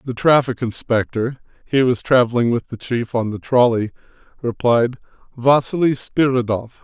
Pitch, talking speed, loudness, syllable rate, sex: 120 Hz, 130 wpm, -18 LUFS, 3.1 syllables/s, male